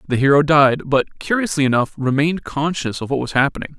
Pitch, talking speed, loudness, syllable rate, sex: 145 Hz, 190 wpm, -18 LUFS, 6.0 syllables/s, male